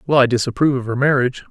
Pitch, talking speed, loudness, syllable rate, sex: 130 Hz, 240 wpm, -17 LUFS, 8.2 syllables/s, male